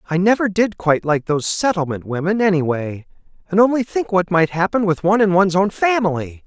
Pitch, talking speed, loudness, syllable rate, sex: 185 Hz, 195 wpm, -18 LUFS, 6.0 syllables/s, male